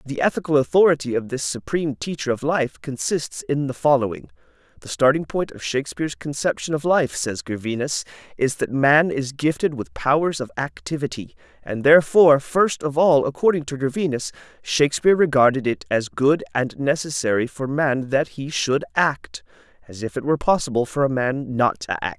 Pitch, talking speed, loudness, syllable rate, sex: 135 Hz, 175 wpm, -21 LUFS, 4.8 syllables/s, male